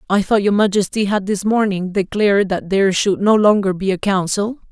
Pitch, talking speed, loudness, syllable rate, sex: 200 Hz, 205 wpm, -16 LUFS, 5.4 syllables/s, male